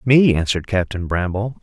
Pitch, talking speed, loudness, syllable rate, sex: 105 Hz, 150 wpm, -19 LUFS, 5.2 syllables/s, male